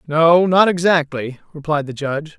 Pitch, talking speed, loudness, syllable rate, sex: 160 Hz, 125 wpm, -16 LUFS, 4.7 syllables/s, male